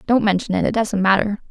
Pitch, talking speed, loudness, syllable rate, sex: 205 Hz, 240 wpm, -18 LUFS, 6.1 syllables/s, female